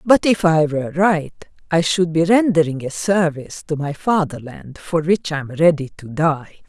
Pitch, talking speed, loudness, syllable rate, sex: 160 Hz, 190 wpm, -18 LUFS, 4.6 syllables/s, female